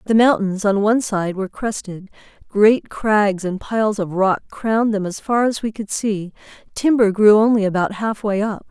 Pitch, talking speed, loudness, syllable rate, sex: 210 Hz, 185 wpm, -18 LUFS, 4.9 syllables/s, female